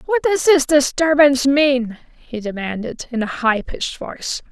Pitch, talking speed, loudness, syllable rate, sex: 270 Hz, 160 wpm, -17 LUFS, 4.6 syllables/s, female